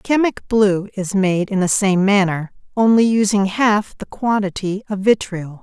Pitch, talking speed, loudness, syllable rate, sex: 200 Hz, 160 wpm, -17 LUFS, 4.2 syllables/s, female